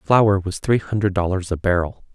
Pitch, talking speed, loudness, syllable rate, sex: 95 Hz, 195 wpm, -20 LUFS, 4.9 syllables/s, male